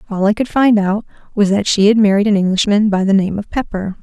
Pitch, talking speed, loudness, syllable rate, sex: 205 Hz, 255 wpm, -14 LUFS, 6.0 syllables/s, female